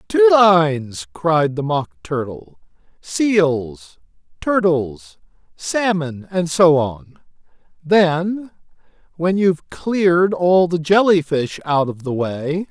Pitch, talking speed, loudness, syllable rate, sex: 160 Hz, 115 wpm, -17 LUFS, 3.1 syllables/s, male